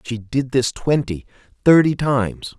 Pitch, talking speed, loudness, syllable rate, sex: 130 Hz, 140 wpm, -19 LUFS, 4.3 syllables/s, male